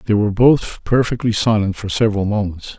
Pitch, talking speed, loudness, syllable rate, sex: 105 Hz, 175 wpm, -17 LUFS, 5.8 syllables/s, male